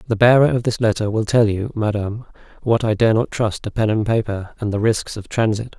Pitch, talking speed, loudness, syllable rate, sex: 110 Hz, 240 wpm, -19 LUFS, 5.7 syllables/s, male